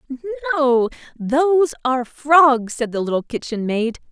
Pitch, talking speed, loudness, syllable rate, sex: 275 Hz, 130 wpm, -18 LUFS, 5.2 syllables/s, female